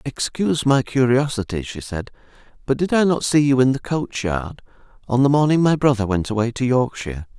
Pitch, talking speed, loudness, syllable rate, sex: 125 Hz, 185 wpm, -19 LUFS, 5.6 syllables/s, male